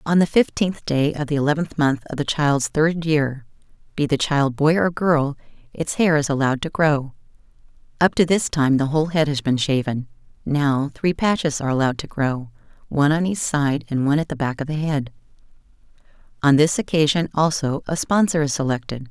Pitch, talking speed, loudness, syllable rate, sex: 150 Hz, 195 wpm, -20 LUFS, 3.9 syllables/s, female